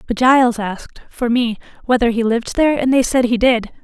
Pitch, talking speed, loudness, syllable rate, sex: 240 Hz, 220 wpm, -16 LUFS, 5.9 syllables/s, female